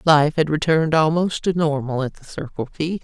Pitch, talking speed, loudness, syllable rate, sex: 155 Hz, 200 wpm, -20 LUFS, 5.3 syllables/s, female